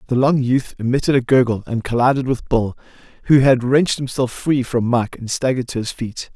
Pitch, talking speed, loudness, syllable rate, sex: 125 Hz, 210 wpm, -18 LUFS, 5.6 syllables/s, male